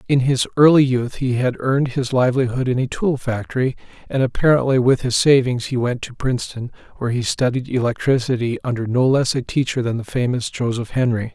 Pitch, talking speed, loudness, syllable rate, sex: 125 Hz, 190 wpm, -19 LUFS, 5.8 syllables/s, male